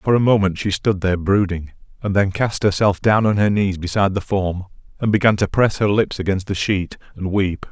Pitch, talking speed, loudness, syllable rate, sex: 100 Hz, 225 wpm, -19 LUFS, 5.4 syllables/s, male